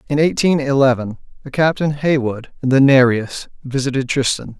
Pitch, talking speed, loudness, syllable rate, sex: 135 Hz, 145 wpm, -16 LUFS, 5.1 syllables/s, male